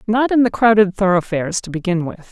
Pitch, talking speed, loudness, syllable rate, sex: 200 Hz, 205 wpm, -16 LUFS, 6.0 syllables/s, female